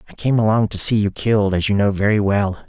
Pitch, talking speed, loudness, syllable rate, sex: 105 Hz, 270 wpm, -17 LUFS, 6.1 syllables/s, male